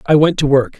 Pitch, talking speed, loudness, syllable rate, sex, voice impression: 145 Hz, 305 wpm, -13 LUFS, 6.0 syllables/s, male, masculine, adult-like, slightly relaxed, slightly weak, slightly muffled, fluent, slightly intellectual, slightly refreshing, friendly, unique, slightly modest